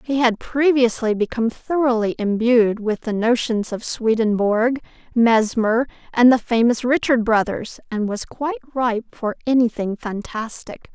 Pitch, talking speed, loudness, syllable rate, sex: 235 Hz, 130 wpm, -19 LUFS, 4.4 syllables/s, female